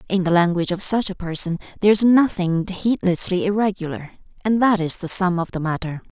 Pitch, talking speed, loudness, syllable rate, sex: 185 Hz, 185 wpm, -19 LUFS, 5.8 syllables/s, female